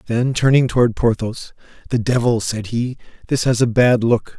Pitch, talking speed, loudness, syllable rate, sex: 120 Hz, 180 wpm, -18 LUFS, 4.8 syllables/s, male